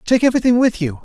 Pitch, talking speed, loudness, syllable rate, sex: 220 Hz, 230 wpm, -15 LUFS, 7.5 syllables/s, male